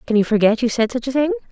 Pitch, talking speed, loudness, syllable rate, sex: 230 Hz, 315 wpm, -18 LUFS, 7.4 syllables/s, female